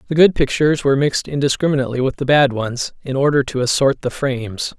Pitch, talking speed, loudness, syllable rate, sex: 135 Hz, 200 wpm, -17 LUFS, 6.5 syllables/s, male